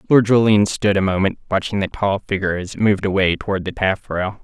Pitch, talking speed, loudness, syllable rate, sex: 100 Hz, 215 wpm, -18 LUFS, 6.1 syllables/s, male